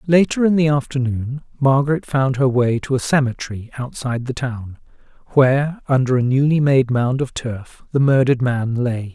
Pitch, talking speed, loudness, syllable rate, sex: 130 Hz, 170 wpm, -18 LUFS, 5.1 syllables/s, male